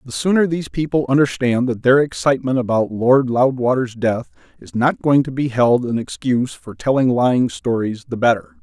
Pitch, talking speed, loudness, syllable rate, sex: 125 Hz, 180 wpm, -18 LUFS, 5.3 syllables/s, male